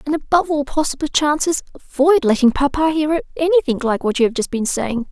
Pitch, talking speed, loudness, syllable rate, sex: 285 Hz, 200 wpm, -17 LUFS, 5.8 syllables/s, female